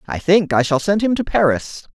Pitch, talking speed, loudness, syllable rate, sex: 175 Hz, 245 wpm, -17 LUFS, 5.2 syllables/s, male